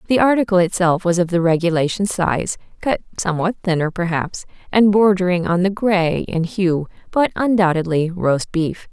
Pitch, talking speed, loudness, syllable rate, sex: 185 Hz, 155 wpm, -18 LUFS, 4.9 syllables/s, female